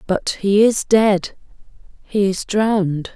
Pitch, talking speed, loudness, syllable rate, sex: 200 Hz, 115 wpm, -17 LUFS, 3.5 syllables/s, female